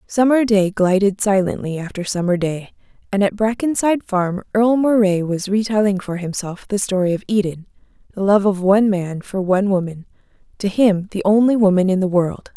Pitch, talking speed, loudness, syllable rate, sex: 200 Hz, 175 wpm, -18 LUFS, 5.4 syllables/s, female